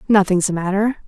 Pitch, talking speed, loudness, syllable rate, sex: 195 Hz, 170 wpm, -18 LUFS, 5.6 syllables/s, female